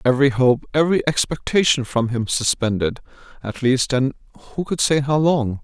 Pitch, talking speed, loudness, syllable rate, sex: 135 Hz, 160 wpm, -19 LUFS, 5.2 syllables/s, male